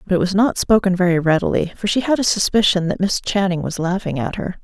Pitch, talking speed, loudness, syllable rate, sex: 190 Hz, 245 wpm, -18 LUFS, 6.0 syllables/s, female